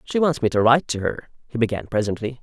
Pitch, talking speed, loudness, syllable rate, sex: 120 Hz, 250 wpm, -21 LUFS, 6.8 syllables/s, male